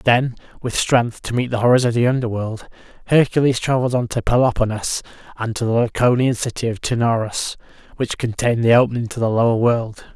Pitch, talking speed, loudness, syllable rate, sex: 120 Hz, 175 wpm, -19 LUFS, 5.9 syllables/s, male